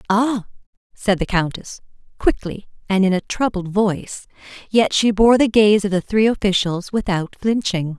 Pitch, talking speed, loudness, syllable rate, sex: 200 Hz, 160 wpm, -18 LUFS, 4.6 syllables/s, female